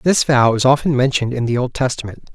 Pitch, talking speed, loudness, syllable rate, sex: 130 Hz, 230 wpm, -16 LUFS, 6.1 syllables/s, male